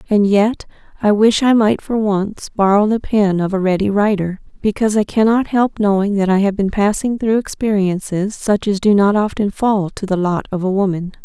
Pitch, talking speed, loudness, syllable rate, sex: 205 Hz, 210 wpm, -16 LUFS, 5.0 syllables/s, female